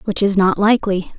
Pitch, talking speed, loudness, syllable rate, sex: 195 Hz, 205 wpm, -16 LUFS, 5.8 syllables/s, female